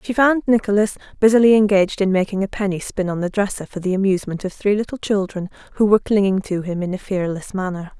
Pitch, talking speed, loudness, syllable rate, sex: 200 Hz, 220 wpm, -19 LUFS, 6.5 syllables/s, female